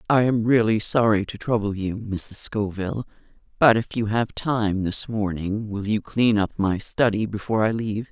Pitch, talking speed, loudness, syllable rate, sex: 110 Hz, 185 wpm, -23 LUFS, 4.8 syllables/s, female